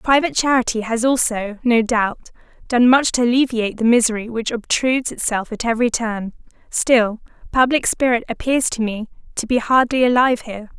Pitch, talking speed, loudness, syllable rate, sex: 235 Hz, 160 wpm, -18 LUFS, 5.5 syllables/s, female